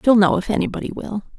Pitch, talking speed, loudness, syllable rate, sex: 210 Hz, 215 wpm, -20 LUFS, 7.1 syllables/s, female